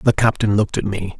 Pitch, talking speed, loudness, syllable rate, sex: 105 Hz, 250 wpm, -19 LUFS, 6.1 syllables/s, male